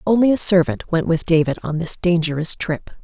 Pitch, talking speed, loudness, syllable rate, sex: 170 Hz, 200 wpm, -18 LUFS, 5.3 syllables/s, female